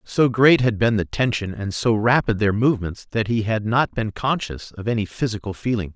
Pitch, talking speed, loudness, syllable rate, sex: 110 Hz, 210 wpm, -21 LUFS, 5.2 syllables/s, male